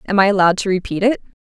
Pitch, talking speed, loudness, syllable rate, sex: 195 Hz, 255 wpm, -16 LUFS, 8.3 syllables/s, female